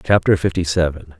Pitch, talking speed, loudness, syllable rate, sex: 85 Hz, 150 wpm, -18 LUFS, 5.6 syllables/s, male